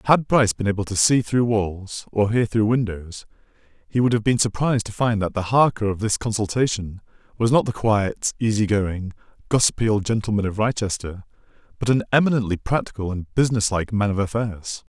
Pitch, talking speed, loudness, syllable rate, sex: 110 Hz, 185 wpm, -21 LUFS, 5.6 syllables/s, male